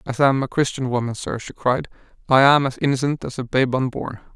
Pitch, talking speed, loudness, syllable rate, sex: 130 Hz, 235 wpm, -20 LUFS, 5.9 syllables/s, male